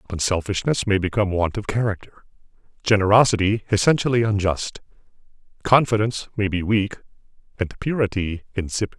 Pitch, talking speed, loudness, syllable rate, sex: 100 Hz, 105 wpm, -21 LUFS, 5.8 syllables/s, male